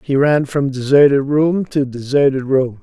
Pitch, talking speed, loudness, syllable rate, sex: 135 Hz, 170 wpm, -15 LUFS, 4.4 syllables/s, male